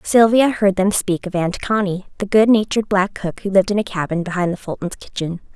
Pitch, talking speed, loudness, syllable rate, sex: 195 Hz, 215 wpm, -18 LUFS, 5.7 syllables/s, female